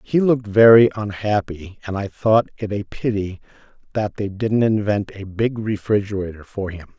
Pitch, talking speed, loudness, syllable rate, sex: 105 Hz, 165 wpm, -19 LUFS, 4.7 syllables/s, male